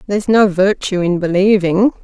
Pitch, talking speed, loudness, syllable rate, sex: 195 Hz, 150 wpm, -14 LUFS, 5.1 syllables/s, female